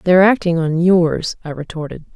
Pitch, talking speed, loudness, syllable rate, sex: 170 Hz, 165 wpm, -16 LUFS, 5.3 syllables/s, female